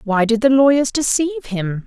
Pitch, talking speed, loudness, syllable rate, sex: 245 Hz, 195 wpm, -16 LUFS, 5.6 syllables/s, female